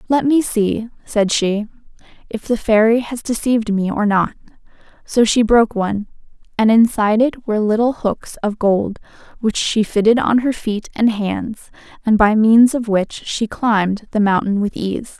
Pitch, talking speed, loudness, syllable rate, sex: 220 Hz, 175 wpm, -17 LUFS, 4.6 syllables/s, female